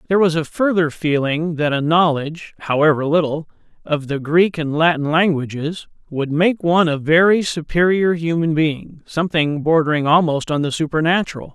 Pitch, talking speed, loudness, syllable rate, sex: 160 Hz, 155 wpm, -17 LUFS, 5.2 syllables/s, male